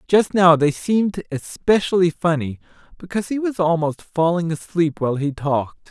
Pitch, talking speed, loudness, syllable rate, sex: 170 Hz, 150 wpm, -20 LUFS, 5.2 syllables/s, male